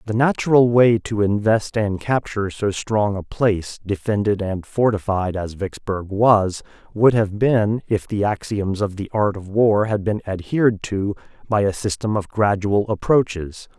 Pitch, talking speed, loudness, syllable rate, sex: 105 Hz, 165 wpm, -20 LUFS, 4.4 syllables/s, male